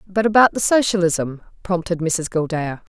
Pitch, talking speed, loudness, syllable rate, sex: 180 Hz, 140 wpm, -19 LUFS, 4.8 syllables/s, female